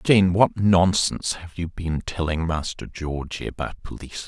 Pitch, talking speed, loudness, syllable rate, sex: 85 Hz, 155 wpm, -23 LUFS, 4.8 syllables/s, male